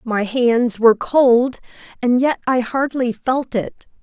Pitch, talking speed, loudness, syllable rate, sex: 245 Hz, 135 wpm, -17 LUFS, 3.7 syllables/s, female